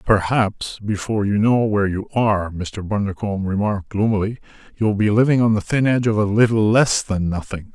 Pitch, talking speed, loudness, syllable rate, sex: 105 Hz, 185 wpm, -19 LUFS, 5.6 syllables/s, male